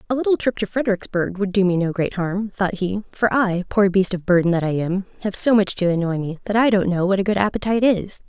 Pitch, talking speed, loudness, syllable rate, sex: 195 Hz, 270 wpm, -20 LUFS, 6.1 syllables/s, female